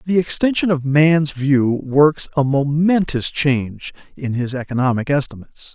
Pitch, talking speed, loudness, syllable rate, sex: 145 Hz, 135 wpm, -17 LUFS, 4.5 syllables/s, male